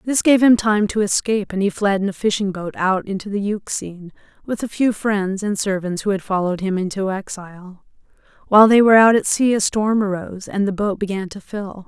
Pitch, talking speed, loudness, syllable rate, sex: 200 Hz, 220 wpm, -18 LUFS, 5.7 syllables/s, female